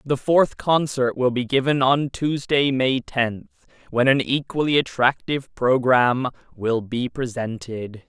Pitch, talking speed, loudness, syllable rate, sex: 130 Hz, 135 wpm, -21 LUFS, 4.2 syllables/s, male